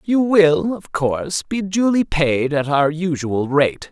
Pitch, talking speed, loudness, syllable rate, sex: 160 Hz, 170 wpm, -18 LUFS, 3.7 syllables/s, male